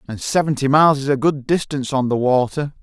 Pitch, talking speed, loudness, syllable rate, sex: 140 Hz, 215 wpm, -18 LUFS, 6.2 syllables/s, male